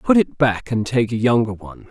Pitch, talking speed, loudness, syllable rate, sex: 120 Hz, 250 wpm, -19 LUFS, 5.4 syllables/s, male